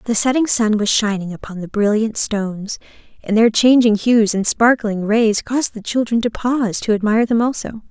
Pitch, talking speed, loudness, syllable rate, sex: 220 Hz, 190 wpm, -16 LUFS, 5.2 syllables/s, female